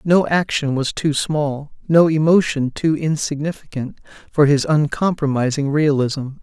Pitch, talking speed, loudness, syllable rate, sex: 150 Hz, 120 wpm, -18 LUFS, 4.4 syllables/s, male